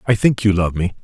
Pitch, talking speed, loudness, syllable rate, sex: 100 Hz, 290 wpm, -17 LUFS, 6.0 syllables/s, male